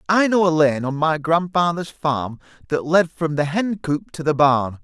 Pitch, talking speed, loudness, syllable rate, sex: 160 Hz, 210 wpm, -20 LUFS, 4.4 syllables/s, male